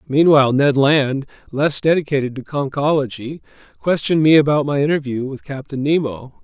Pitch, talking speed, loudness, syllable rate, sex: 140 Hz, 140 wpm, -17 LUFS, 5.3 syllables/s, male